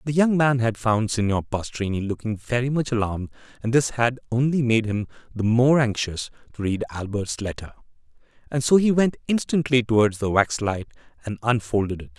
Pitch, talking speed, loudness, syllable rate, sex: 115 Hz, 170 wpm, -23 LUFS, 5.4 syllables/s, male